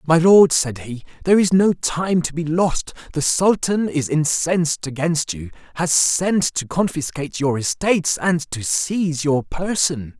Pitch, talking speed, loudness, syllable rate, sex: 160 Hz, 165 wpm, -19 LUFS, 4.3 syllables/s, male